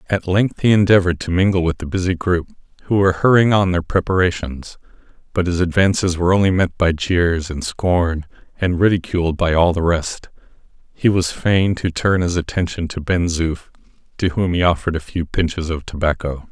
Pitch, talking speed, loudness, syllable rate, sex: 90 Hz, 185 wpm, -18 LUFS, 5.4 syllables/s, male